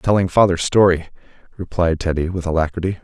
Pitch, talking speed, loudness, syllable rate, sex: 85 Hz, 140 wpm, -18 LUFS, 6.1 syllables/s, male